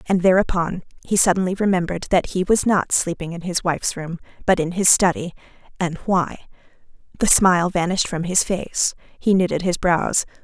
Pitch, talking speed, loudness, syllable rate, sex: 180 Hz, 175 wpm, -20 LUFS, 5.3 syllables/s, female